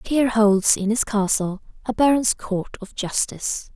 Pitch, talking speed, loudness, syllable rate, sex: 220 Hz, 175 wpm, -21 LUFS, 4.6 syllables/s, female